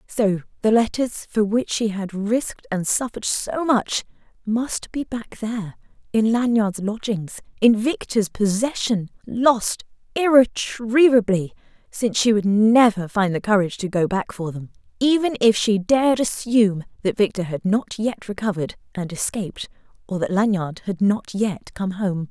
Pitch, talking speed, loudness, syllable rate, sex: 210 Hz, 150 wpm, -21 LUFS, 4.5 syllables/s, female